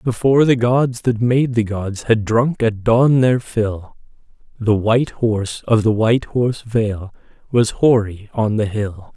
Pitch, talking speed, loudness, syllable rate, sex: 115 Hz, 170 wpm, -17 LUFS, 4.1 syllables/s, male